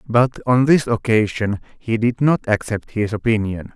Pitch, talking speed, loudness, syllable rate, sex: 115 Hz, 160 wpm, -19 LUFS, 4.3 syllables/s, male